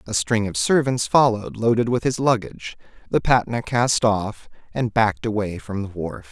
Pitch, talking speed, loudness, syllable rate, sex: 110 Hz, 180 wpm, -21 LUFS, 5.0 syllables/s, male